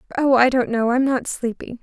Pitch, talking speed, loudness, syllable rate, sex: 250 Hz, 230 wpm, -19 LUFS, 5.4 syllables/s, female